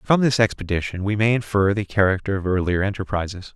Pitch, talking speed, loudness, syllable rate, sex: 100 Hz, 200 wpm, -21 LUFS, 6.3 syllables/s, male